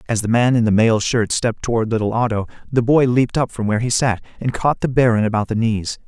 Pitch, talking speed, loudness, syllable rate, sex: 115 Hz, 255 wpm, -18 LUFS, 6.2 syllables/s, male